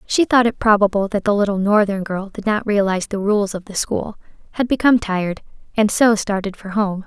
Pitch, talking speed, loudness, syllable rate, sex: 205 Hz, 210 wpm, -18 LUFS, 5.6 syllables/s, female